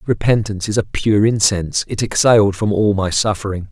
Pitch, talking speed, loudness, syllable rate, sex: 105 Hz, 180 wpm, -16 LUFS, 5.6 syllables/s, male